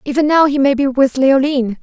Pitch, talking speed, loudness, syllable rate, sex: 275 Hz, 230 wpm, -13 LUFS, 5.8 syllables/s, female